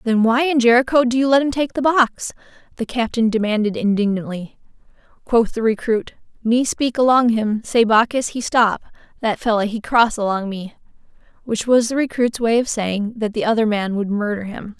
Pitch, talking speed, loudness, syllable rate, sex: 230 Hz, 180 wpm, -18 LUFS, 5.1 syllables/s, female